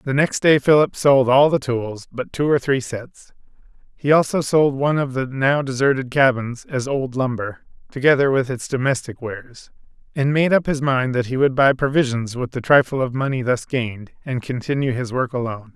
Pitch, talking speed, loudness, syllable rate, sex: 130 Hz, 200 wpm, -19 LUFS, 5.1 syllables/s, male